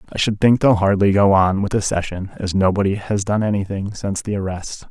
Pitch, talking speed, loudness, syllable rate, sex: 100 Hz, 220 wpm, -18 LUFS, 5.7 syllables/s, male